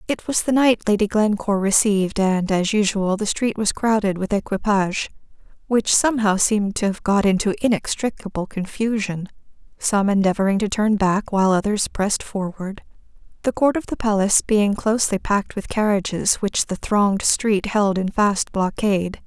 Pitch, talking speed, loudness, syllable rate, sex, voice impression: 205 Hz, 155 wpm, -20 LUFS, 5.2 syllables/s, female, feminine, adult-like, fluent, slightly cute, refreshing, friendly, kind